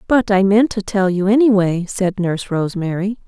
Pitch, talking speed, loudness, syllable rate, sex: 200 Hz, 185 wpm, -16 LUFS, 5.3 syllables/s, female